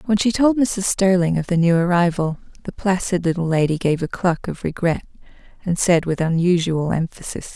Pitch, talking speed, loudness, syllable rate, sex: 175 Hz, 185 wpm, -19 LUFS, 5.2 syllables/s, female